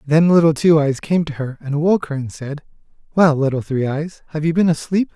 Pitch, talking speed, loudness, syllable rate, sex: 155 Hz, 235 wpm, -18 LUFS, 5.2 syllables/s, male